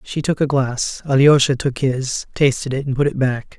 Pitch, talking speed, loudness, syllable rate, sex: 135 Hz, 220 wpm, -18 LUFS, 4.8 syllables/s, male